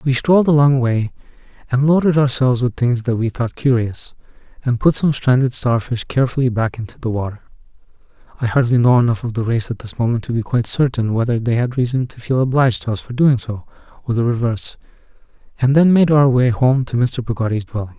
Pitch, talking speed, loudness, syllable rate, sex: 125 Hz, 205 wpm, -17 LUFS, 6.1 syllables/s, male